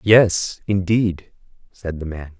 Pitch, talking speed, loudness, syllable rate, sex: 90 Hz, 125 wpm, -20 LUFS, 3.4 syllables/s, male